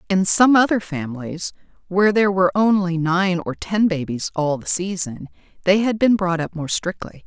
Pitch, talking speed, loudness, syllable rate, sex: 180 Hz, 180 wpm, -19 LUFS, 5.1 syllables/s, female